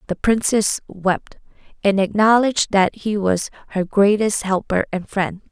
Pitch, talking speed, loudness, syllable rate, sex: 200 Hz, 140 wpm, -19 LUFS, 4.3 syllables/s, female